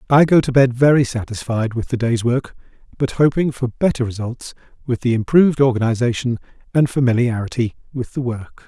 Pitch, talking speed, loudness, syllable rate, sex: 125 Hz, 165 wpm, -18 LUFS, 5.6 syllables/s, male